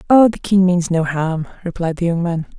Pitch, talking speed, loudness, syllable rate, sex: 175 Hz, 230 wpm, -17 LUFS, 5.1 syllables/s, female